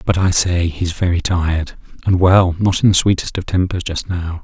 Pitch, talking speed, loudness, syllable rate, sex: 90 Hz, 190 wpm, -16 LUFS, 5.0 syllables/s, male